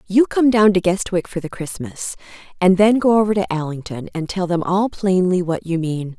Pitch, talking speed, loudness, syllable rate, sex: 185 Hz, 215 wpm, -18 LUFS, 5.1 syllables/s, female